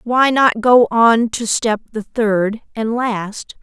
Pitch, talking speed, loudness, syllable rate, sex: 225 Hz, 165 wpm, -16 LUFS, 3.1 syllables/s, female